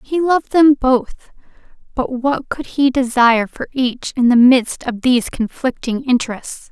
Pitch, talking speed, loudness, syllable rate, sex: 255 Hz, 160 wpm, -16 LUFS, 4.4 syllables/s, female